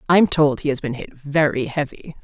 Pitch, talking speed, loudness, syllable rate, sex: 145 Hz, 215 wpm, -20 LUFS, 5.0 syllables/s, female